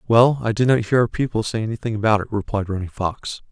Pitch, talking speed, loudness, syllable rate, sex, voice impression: 110 Hz, 240 wpm, -20 LUFS, 6.2 syllables/s, male, masculine, adult-like, slightly cool, slightly refreshing, sincere, friendly